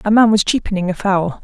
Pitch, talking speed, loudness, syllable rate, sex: 200 Hz, 250 wpm, -16 LUFS, 6.0 syllables/s, female